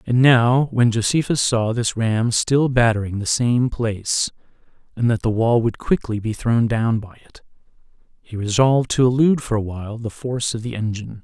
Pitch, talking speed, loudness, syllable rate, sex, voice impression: 115 Hz, 185 wpm, -19 LUFS, 5.1 syllables/s, male, masculine, middle-aged, slightly thick, relaxed, slightly weak, fluent, cool, sincere, calm, slightly mature, reassuring, elegant, wild, kind, slightly modest